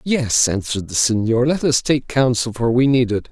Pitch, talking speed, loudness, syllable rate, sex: 120 Hz, 215 wpm, -17 LUFS, 5.0 syllables/s, male